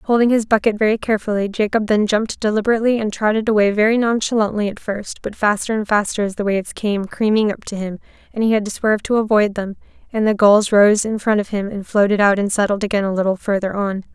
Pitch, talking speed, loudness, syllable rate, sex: 210 Hz, 230 wpm, -18 LUFS, 6.3 syllables/s, female